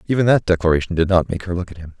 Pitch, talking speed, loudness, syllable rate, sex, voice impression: 90 Hz, 300 wpm, -18 LUFS, 7.7 syllables/s, male, very masculine, very middle-aged, very thick, slightly relaxed, powerful, slightly bright, hard, soft, clear, fluent, cute, cool, slightly refreshing, sincere, very calm, mature, very friendly, very reassuring, very unique, elegant, wild, sweet, lively, kind, very modest, slightly light